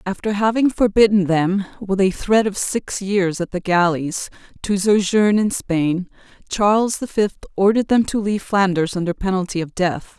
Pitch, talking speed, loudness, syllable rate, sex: 195 Hz, 170 wpm, -19 LUFS, 4.8 syllables/s, female